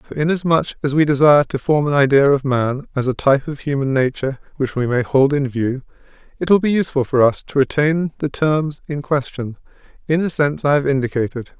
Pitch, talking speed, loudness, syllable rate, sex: 140 Hz, 210 wpm, -18 LUFS, 5.8 syllables/s, male